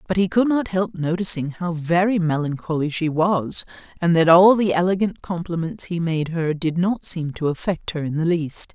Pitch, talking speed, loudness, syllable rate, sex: 170 Hz, 200 wpm, -21 LUFS, 4.9 syllables/s, female